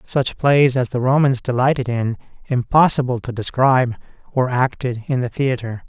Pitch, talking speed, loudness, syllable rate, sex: 125 Hz, 155 wpm, -18 LUFS, 5.1 syllables/s, male